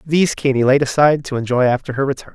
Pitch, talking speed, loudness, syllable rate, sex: 135 Hz, 230 wpm, -16 LUFS, 7.1 syllables/s, male